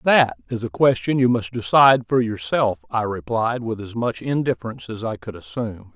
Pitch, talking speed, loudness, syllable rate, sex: 115 Hz, 190 wpm, -21 LUFS, 5.4 syllables/s, male